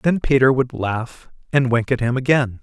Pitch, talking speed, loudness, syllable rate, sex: 125 Hz, 205 wpm, -19 LUFS, 4.6 syllables/s, male